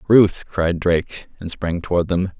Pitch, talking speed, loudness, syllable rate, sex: 90 Hz, 150 wpm, -20 LUFS, 4.5 syllables/s, male